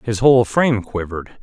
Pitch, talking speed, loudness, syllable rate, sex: 110 Hz, 170 wpm, -17 LUFS, 6.1 syllables/s, male